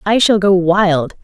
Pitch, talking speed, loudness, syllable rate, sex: 190 Hz, 195 wpm, -13 LUFS, 3.7 syllables/s, female